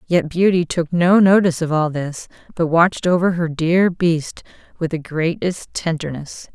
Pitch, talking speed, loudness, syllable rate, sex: 170 Hz, 165 wpm, -18 LUFS, 4.5 syllables/s, female